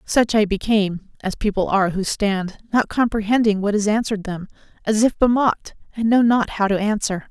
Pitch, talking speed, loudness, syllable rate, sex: 210 Hz, 190 wpm, -20 LUFS, 5.5 syllables/s, female